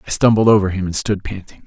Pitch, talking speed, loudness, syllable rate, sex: 100 Hz, 250 wpm, -16 LUFS, 6.5 syllables/s, male